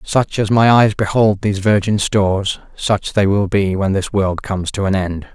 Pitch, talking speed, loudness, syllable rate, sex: 100 Hz, 215 wpm, -16 LUFS, 4.7 syllables/s, male